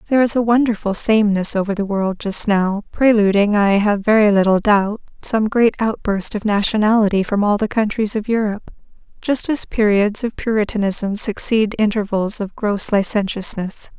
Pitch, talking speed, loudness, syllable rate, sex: 210 Hz, 155 wpm, -17 LUFS, 5.0 syllables/s, female